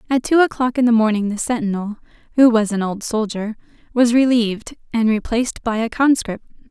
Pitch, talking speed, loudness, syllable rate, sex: 230 Hz, 180 wpm, -18 LUFS, 5.6 syllables/s, female